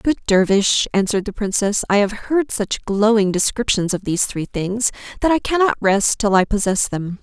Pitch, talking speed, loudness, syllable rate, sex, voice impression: 210 Hz, 190 wpm, -18 LUFS, 4.9 syllables/s, female, feminine, adult-like, slightly refreshing, sincere, friendly, slightly elegant